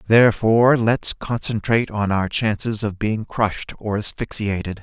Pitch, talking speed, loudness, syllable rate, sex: 110 Hz, 135 wpm, -20 LUFS, 4.8 syllables/s, male